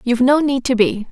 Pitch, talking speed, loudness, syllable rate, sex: 255 Hz, 270 wpm, -16 LUFS, 5.9 syllables/s, female